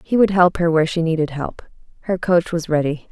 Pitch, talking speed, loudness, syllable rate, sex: 170 Hz, 230 wpm, -18 LUFS, 5.7 syllables/s, female